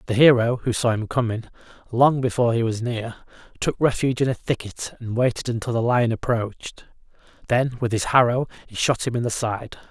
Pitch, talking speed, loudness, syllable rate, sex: 120 Hz, 195 wpm, -22 LUFS, 5.6 syllables/s, male